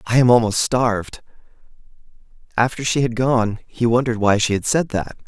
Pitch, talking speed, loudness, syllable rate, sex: 115 Hz, 170 wpm, -19 LUFS, 5.4 syllables/s, male